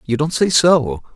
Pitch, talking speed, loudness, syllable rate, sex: 145 Hz, 210 wpm, -15 LUFS, 4.4 syllables/s, male